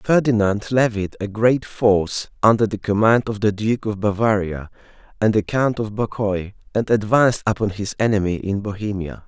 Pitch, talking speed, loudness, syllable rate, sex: 105 Hz, 160 wpm, -20 LUFS, 5.0 syllables/s, male